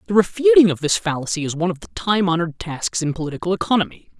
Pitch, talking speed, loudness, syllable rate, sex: 175 Hz, 215 wpm, -19 LUFS, 7.2 syllables/s, male